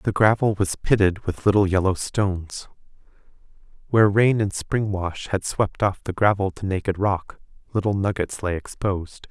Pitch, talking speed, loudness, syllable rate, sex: 100 Hz, 160 wpm, -22 LUFS, 4.9 syllables/s, male